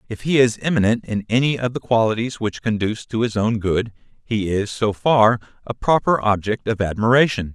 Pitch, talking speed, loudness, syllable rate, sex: 115 Hz, 190 wpm, -19 LUFS, 5.4 syllables/s, male